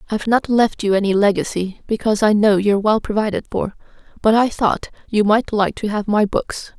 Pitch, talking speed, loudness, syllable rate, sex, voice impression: 210 Hz, 205 wpm, -18 LUFS, 5.5 syllables/s, female, feminine, adult-like, slightly tensed, slightly bright, clear, raspy, intellectual, calm, friendly, reassuring, elegant, slightly lively, slightly sharp